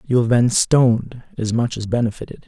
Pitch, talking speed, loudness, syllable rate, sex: 120 Hz, 195 wpm, -18 LUFS, 5.4 syllables/s, male